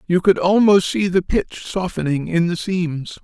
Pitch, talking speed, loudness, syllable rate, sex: 180 Hz, 185 wpm, -18 LUFS, 4.3 syllables/s, male